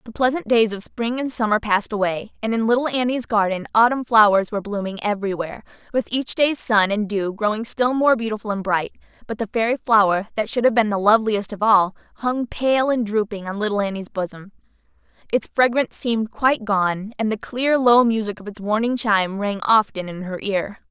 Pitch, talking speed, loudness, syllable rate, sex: 215 Hz, 200 wpm, -20 LUFS, 5.6 syllables/s, female